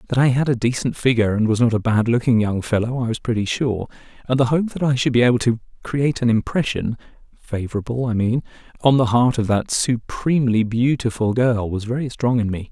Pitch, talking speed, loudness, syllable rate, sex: 120 Hz, 215 wpm, -20 LUFS, 5.6 syllables/s, male